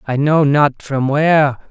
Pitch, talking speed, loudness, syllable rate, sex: 145 Hz, 175 wpm, -14 LUFS, 4.1 syllables/s, male